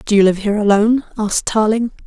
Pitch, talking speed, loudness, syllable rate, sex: 210 Hz, 205 wpm, -15 LUFS, 7.1 syllables/s, female